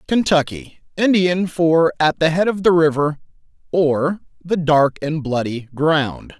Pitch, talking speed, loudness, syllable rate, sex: 160 Hz, 130 wpm, -18 LUFS, 3.8 syllables/s, male